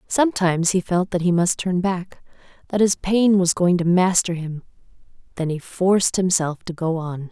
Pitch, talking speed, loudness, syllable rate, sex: 180 Hz, 180 wpm, -20 LUFS, 4.9 syllables/s, female